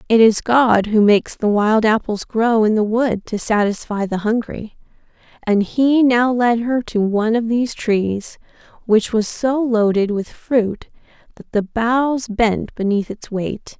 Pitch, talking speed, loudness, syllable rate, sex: 225 Hz, 170 wpm, -17 LUFS, 4.0 syllables/s, female